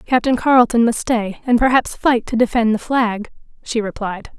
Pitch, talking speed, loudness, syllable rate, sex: 230 Hz, 180 wpm, -17 LUFS, 4.9 syllables/s, female